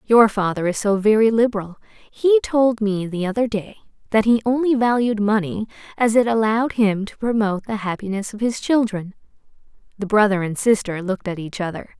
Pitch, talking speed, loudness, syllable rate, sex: 215 Hz, 180 wpm, -20 LUFS, 5.5 syllables/s, female